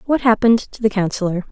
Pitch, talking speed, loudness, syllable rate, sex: 215 Hz, 200 wpm, -17 LUFS, 6.8 syllables/s, female